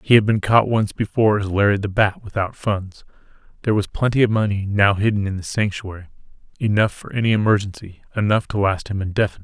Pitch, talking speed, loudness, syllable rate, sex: 105 Hz, 195 wpm, -20 LUFS, 6.5 syllables/s, male